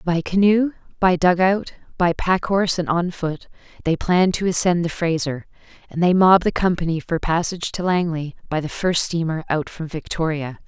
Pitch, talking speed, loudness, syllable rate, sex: 175 Hz, 180 wpm, -20 LUFS, 5.2 syllables/s, female